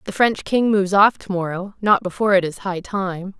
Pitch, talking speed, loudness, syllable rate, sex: 195 Hz, 230 wpm, -19 LUFS, 5.4 syllables/s, female